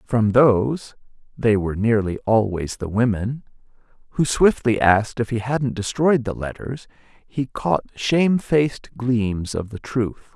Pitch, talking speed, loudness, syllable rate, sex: 115 Hz, 135 wpm, -21 LUFS, 4.2 syllables/s, male